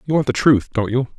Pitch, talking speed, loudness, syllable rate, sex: 125 Hz, 305 wpm, -18 LUFS, 6.2 syllables/s, male